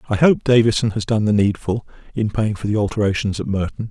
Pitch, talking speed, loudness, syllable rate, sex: 105 Hz, 215 wpm, -19 LUFS, 6.1 syllables/s, male